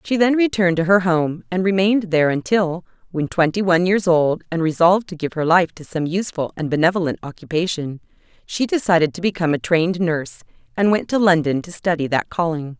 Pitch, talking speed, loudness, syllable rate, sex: 175 Hz, 195 wpm, -19 LUFS, 6.1 syllables/s, female